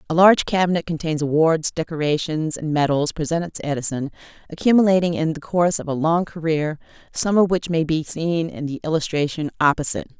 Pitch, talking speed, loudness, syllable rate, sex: 160 Hz, 170 wpm, -20 LUFS, 5.9 syllables/s, female